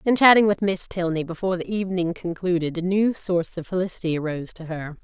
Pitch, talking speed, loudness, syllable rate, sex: 180 Hz, 205 wpm, -23 LUFS, 6.3 syllables/s, female